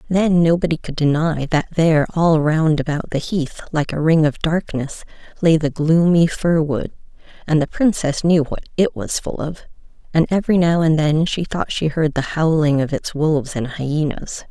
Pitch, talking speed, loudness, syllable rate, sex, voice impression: 155 Hz, 190 wpm, -18 LUFS, 4.8 syllables/s, female, feminine, adult-like, slightly soft, slightly sincere, calm, slightly elegant